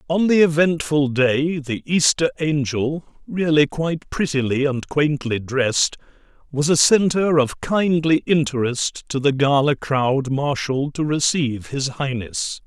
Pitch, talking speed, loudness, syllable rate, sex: 145 Hz, 135 wpm, -19 LUFS, 4.2 syllables/s, male